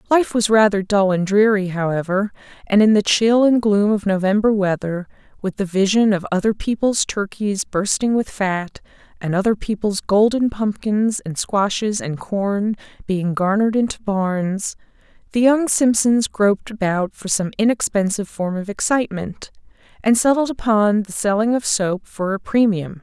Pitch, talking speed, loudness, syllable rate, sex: 205 Hz, 155 wpm, -19 LUFS, 4.6 syllables/s, female